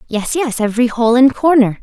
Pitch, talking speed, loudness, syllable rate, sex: 245 Hz, 195 wpm, -14 LUFS, 5.5 syllables/s, female